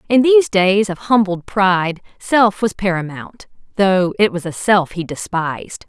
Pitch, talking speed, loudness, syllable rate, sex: 190 Hz, 165 wpm, -16 LUFS, 4.4 syllables/s, female